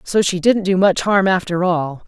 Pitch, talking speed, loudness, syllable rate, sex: 185 Hz, 230 wpm, -16 LUFS, 4.6 syllables/s, female